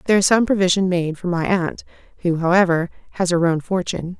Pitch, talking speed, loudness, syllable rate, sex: 180 Hz, 200 wpm, -19 LUFS, 6.3 syllables/s, female